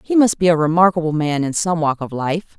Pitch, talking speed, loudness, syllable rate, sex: 165 Hz, 255 wpm, -17 LUFS, 5.6 syllables/s, female